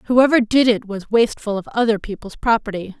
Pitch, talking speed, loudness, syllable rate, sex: 220 Hz, 180 wpm, -18 LUFS, 5.7 syllables/s, female